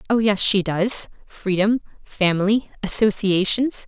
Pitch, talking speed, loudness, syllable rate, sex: 205 Hz, 110 wpm, -19 LUFS, 4.2 syllables/s, female